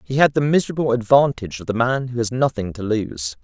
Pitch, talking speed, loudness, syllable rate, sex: 120 Hz, 225 wpm, -20 LUFS, 6.0 syllables/s, male